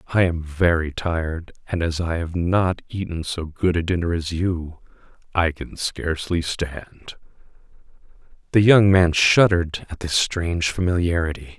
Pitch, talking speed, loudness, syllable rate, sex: 85 Hz, 145 wpm, -21 LUFS, 4.4 syllables/s, male